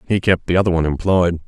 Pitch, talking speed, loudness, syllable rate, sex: 90 Hz, 245 wpm, -17 LUFS, 7.1 syllables/s, male